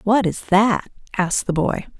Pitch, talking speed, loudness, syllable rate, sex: 200 Hz, 180 wpm, -20 LUFS, 4.7 syllables/s, female